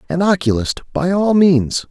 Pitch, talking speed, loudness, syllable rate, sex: 165 Hz, 160 wpm, -15 LUFS, 4.5 syllables/s, male